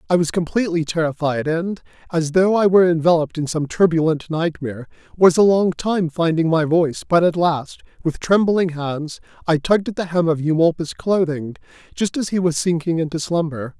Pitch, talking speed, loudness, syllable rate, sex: 165 Hz, 185 wpm, -19 LUFS, 5.4 syllables/s, male